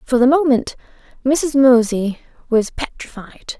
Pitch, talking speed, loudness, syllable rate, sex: 255 Hz, 115 wpm, -16 LUFS, 4.1 syllables/s, female